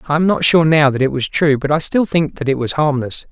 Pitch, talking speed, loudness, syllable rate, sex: 150 Hz, 305 wpm, -15 LUFS, 5.7 syllables/s, male